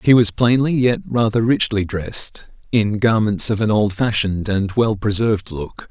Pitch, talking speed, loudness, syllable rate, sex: 110 Hz, 165 wpm, -18 LUFS, 4.7 syllables/s, male